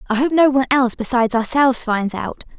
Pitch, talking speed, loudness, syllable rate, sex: 250 Hz, 210 wpm, -17 LUFS, 6.8 syllables/s, female